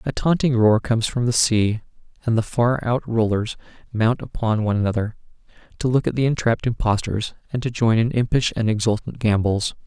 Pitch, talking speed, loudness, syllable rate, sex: 115 Hz, 180 wpm, -21 LUFS, 5.6 syllables/s, male